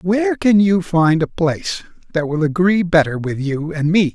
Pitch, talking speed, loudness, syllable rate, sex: 170 Hz, 205 wpm, -17 LUFS, 4.7 syllables/s, male